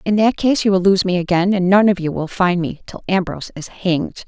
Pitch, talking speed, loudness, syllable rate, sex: 185 Hz, 265 wpm, -17 LUFS, 5.7 syllables/s, female